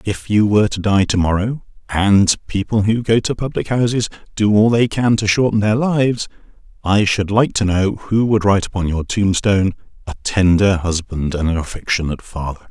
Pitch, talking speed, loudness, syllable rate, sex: 100 Hz, 180 wpm, -17 LUFS, 5.3 syllables/s, male